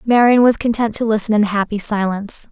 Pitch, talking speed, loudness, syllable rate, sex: 220 Hz, 190 wpm, -16 LUFS, 5.8 syllables/s, female